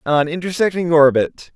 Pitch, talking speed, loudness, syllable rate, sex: 160 Hz, 115 wpm, -16 LUFS, 4.9 syllables/s, male